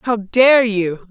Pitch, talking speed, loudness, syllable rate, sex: 215 Hz, 160 wpm, -14 LUFS, 3.1 syllables/s, female